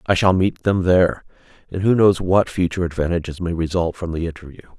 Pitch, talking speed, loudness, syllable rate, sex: 90 Hz, 200 wpm, -19 LUFS, 6.1 syllables/s, male